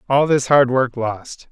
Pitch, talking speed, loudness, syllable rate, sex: 130 Hz, 200 wpm, -17 LUFS, 3.8 syllables/s, male